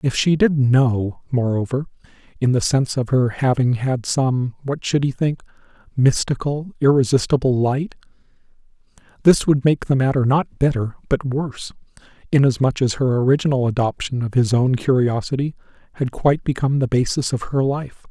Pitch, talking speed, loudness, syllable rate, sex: 130 Hz, 145 wpm, -19 LUFS, 5.1 syllables/s, male